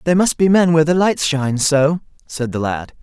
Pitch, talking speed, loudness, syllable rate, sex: 155 Hz, 240 wpm, -16 LUFS, 5.2 syllables/s, male